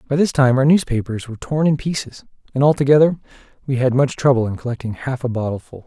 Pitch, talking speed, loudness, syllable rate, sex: 135 Hz, 205 wpm, -18 LUFS, 6.5 syllables/s, male